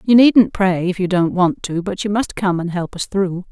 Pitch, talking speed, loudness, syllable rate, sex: 190 Hz, 275 wpm, -17 LUFS, 4.7 syllables/s, female